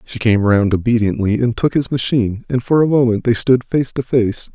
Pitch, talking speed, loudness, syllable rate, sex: 120 Hz, 225 wpm, -16 LUFS, 5.2 syllables/s, male